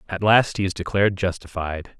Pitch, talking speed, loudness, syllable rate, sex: 95 Hz, 180 wpm, -22 LUFS, 5.5 syllables/s, male